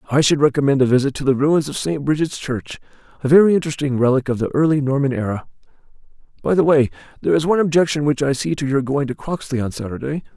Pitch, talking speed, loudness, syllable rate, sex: 140 Hz, 220 wpm, -18 LUFS, 6.9 syllables/s, male